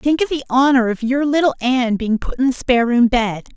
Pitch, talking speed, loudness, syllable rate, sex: 255 Hz, 255 wpm, -17 LUFS, 5.7 syllables/s, female